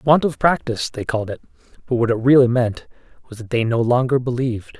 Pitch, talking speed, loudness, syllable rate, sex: 125 Hz, 215 wpm, -19 LUFS, 6.2 syllables/s, male